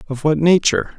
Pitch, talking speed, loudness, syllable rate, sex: 150 Hz, 185 wpm, -16 LUFS, 6.0 syllables/s, male